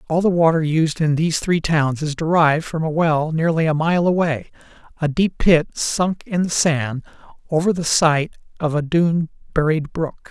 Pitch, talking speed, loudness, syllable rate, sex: 160 Hz, 180 wpm, -19 LUFS, 4.6 syllables/s, male